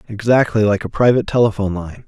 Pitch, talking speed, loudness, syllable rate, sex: 105 Hz, 175 wpm, -16 LUFS, 6.8 syllables/s, male